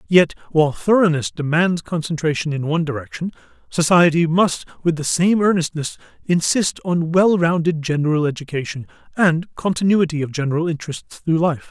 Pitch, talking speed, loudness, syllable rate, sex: 165 Hz, 140 wpm, -19 LUFS, 5.4 syllables/s, male